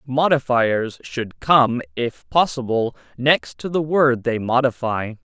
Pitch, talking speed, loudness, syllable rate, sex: 125 Hz, 125 wpm, -20 LUFS, 3.6 syllables/s, male